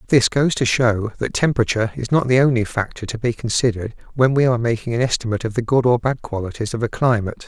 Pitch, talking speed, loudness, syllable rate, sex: 120 Hz, 235 wpm, -19 LUFS, 6.8 syllables/s, male